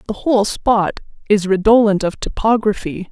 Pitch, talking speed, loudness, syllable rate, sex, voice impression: 210 Hz, 135 wpm, -16 LUFS, 4.9 syllables/s, female, feminine, adult-like, slightly muffled, slightly intellectual